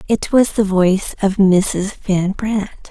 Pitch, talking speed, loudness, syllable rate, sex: 200 Hz, 165 wpm, -16 LUFS, 3.6 syllables/s, female